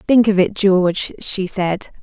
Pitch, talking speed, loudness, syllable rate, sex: 195 Hz, 180 wpm, -17 LUFS, 4.1 syllables/s, female